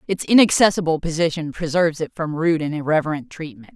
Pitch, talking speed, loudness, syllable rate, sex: 160 Hz, 160 wpm, -19 LUFS, 6.1 syllables/s, female